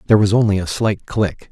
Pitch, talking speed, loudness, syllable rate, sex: 105 Hz, 235 wpm, -17 LUFS, 6.0 syllables/s, male